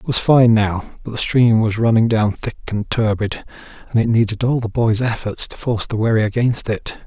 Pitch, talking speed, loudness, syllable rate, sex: 110 Hz, 220 wpm, -17 LUFS, 5.3 syllables/s, male